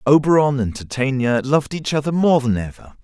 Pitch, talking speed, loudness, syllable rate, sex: 135 Hz, 180 wpm, -18 LUFS, 5.6 syllables/s, male